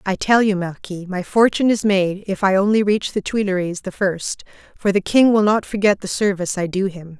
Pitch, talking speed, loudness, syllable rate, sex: 195 Hz, 225 wpm, -18 LUFS, 5.4 syllables/s, female